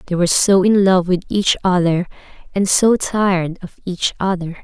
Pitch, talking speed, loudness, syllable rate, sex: 185 Hz, 170 wpm, -16 LUFS, 4.9 syllables/s, female